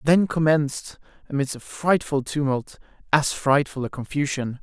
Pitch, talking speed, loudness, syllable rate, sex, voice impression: 145 Hz, 130 wpm, -23 LUFS, 4.7 syllables/s, male, masculine, slightly young, adult-like, slightly thick, tensed, slightly weak, slightly dark, hard, slightly clear, fluent, slightly cool, intellectual, slightly refreshing, sincere, very calm, slightly mature, slightly friendly, slightly reassuring, slightly elegant, slightly sweet, kind